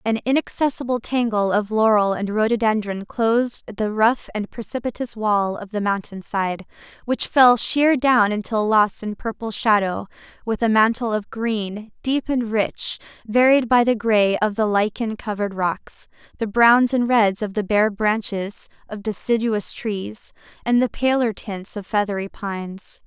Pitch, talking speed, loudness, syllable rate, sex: 220 Hz, 160 wpm, -21 LUFS, 4.4 syllables/s, female